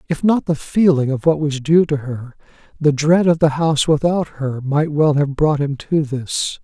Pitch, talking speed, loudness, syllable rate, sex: 150 Hz, 215 wpm, -17 LUFS, 4.5 syllables/s, male